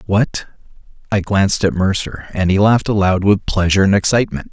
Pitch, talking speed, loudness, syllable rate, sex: 100 Hz, 160 wpm, -15 LUFS, 5.8 syllables/s, male